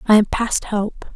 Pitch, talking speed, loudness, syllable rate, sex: 210 Hz, 205 wpm, -19 LUFS, 3.8 syllables/s, female